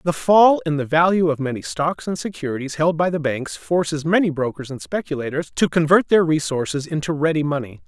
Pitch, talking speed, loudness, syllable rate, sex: 150 Hz, 200 wpm, -20 LUFS, 5.6 syllables/s, male